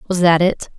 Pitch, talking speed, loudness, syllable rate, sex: 175 Hz, 230 wpm, -15 LUFS, 5.4 syllables/s, female